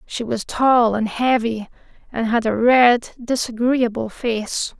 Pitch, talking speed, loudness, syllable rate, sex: 235 Hz, 140 wpm, -19 LUFS, 3.6 syllables/s, female